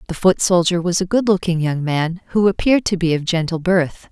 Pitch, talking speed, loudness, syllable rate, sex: 175 Hz, 235 wpm, -17 LUFS, 5.5 syllables/s, female